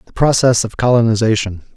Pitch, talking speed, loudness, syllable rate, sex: 115 Hz, 135 wpm, -14 LUFS, 6.0 syllables/s, male